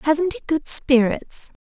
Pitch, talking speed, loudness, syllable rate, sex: 285 Hz, 150 wpm, -19 LUFS, 4.0 syllables/s, female